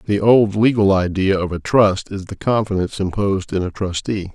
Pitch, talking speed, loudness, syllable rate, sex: 100 Hz, 195 wpm, -18 LUFS, 5.3 syllables/s, male